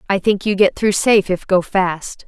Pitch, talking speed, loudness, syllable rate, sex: 195 Hz, 235 wpm, -16 LUFS, 4.8 syllables/s, female